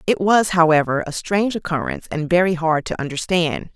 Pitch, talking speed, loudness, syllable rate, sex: 170 Hz, 175 wpm, -19 LUFS, 5.7 syllables/s, female